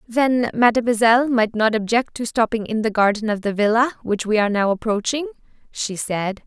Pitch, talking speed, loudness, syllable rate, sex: 225 Hz, 185 wpm, -19 LUFS, 5.4 syllables/s, female